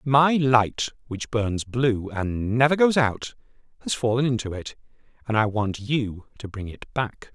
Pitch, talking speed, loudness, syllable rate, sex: 120 Hz, 170 wpm, -24 LUFS, 4.0 syllables/s, male